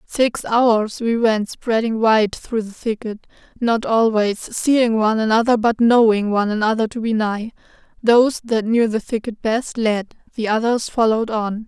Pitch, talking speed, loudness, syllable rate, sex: 225 Hz, 165 wpm, -18 LUFS, 4.5 syllables/s, female